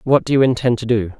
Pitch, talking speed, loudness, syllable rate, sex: 120 Hz, 300 wpm, -16 LUFS, 6.6 syllables/s, male